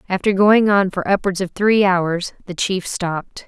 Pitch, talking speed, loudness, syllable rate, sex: 190 Hz, 190 wpm, -18 LUFS, 4.4 syllables/s, female